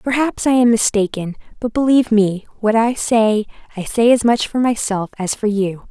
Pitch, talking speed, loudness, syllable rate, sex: 220 Hz, 195 wpm, -17 LUFS, 4.9 syllables/s, female